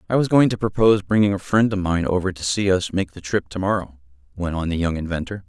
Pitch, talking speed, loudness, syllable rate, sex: 95 Hz, 265 wpm, -21 LUFS, 6.3 syllables/s, male